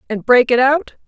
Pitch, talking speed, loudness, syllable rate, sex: 250 Hz, 225 wpm, -14 LUFS, 4.9 syllables/s, female